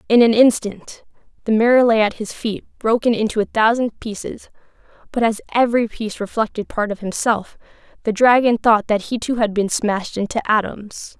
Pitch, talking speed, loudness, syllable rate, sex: 220 Hz, 175 wpm, -18 LUFS, 5.3 syllables/s, female